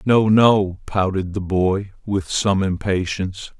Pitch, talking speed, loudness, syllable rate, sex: 100 Hz, 135 wpm, -19 LUFS, 3.7 syllables/s, male